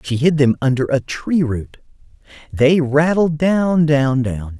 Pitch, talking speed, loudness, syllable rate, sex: 145 Hz, 155 wpm, -16 LUFS, 3.8 syllables/s, male